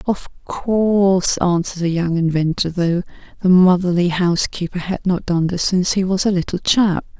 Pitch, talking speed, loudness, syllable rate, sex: 180 Hz, 165 wpm, -17 LUFS, 4.9 syllables/s, female